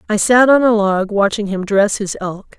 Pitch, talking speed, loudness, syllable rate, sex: 210 Hz, 230 wpm, -14 LUFS, 4.6 syllables/s, female